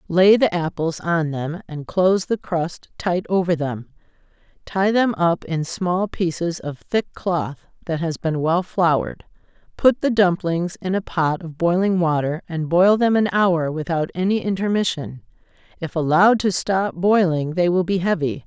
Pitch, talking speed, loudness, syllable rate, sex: 175 Hz, 160 wpm, -20 LUFS, 4.4 syllables/s, female